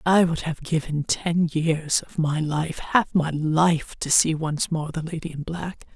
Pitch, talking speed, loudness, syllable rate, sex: 160 Hz, 180 wpm, -23 LUFS, 3.9 syllables/s, female